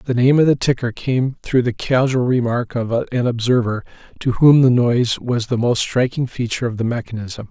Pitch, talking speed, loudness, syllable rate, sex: 125 Hz, 200 wpm, -18 LUFS, 5.1 syllables/s, male